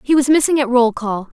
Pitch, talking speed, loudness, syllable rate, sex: 255 Hz, 260 wpm, -15 LUFS, 5.7 syllables/s, female